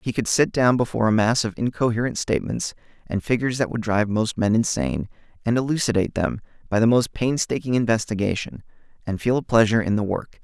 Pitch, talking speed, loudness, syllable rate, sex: 115 Hz, 190 wpm, -22 LUFS, 6.4 syllables/s, male